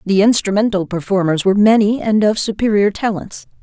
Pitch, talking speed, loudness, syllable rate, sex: 205 Hz, 150 wpm, -15 LUFS, 5.6 syllables/s, female